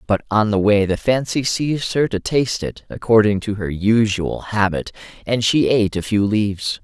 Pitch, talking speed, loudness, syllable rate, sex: 110 Hz, 195 wpm, -18 LUFS, 5.0 syllables/s, male